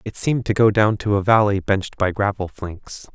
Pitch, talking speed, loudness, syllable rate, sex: 100 Hz, 230 wpm, -19 LUFS, 5.3 syllables/s, male